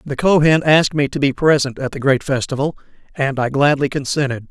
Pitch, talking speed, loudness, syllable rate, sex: 140 Hz, 200 wpm, -17 LUFS, 5.7 syllables/s, male